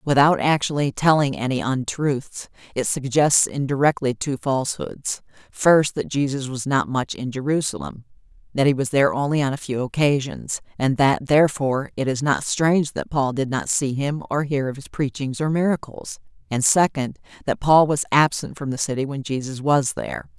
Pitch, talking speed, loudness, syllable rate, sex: 140 Hz, 175 wpm, -21 LUFS, 5.1 syllables/s, female